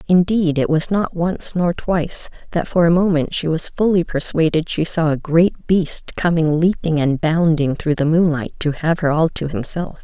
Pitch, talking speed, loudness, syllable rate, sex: 165 Hz, 195 wpm, -18 LUFS, 4.6 syllables/s, female